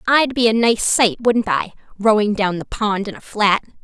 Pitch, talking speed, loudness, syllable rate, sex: 215 Hz, 220 wpm, -17 LUFS, 4.7 syllables/s, female